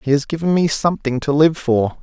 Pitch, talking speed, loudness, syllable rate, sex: 145 Hz, 235 wpm, -17 LUFS, 5.8 syllables/s, male